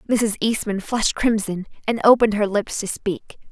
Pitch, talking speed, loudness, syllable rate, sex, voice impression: 210 Hz, 170 wpm, -20 LUFS, 5.2 syllables/s, female, feminine, slightly young, tensed, bright, clear, fluent, intellectual, slightly calm, friendly, reassuring, lively, kind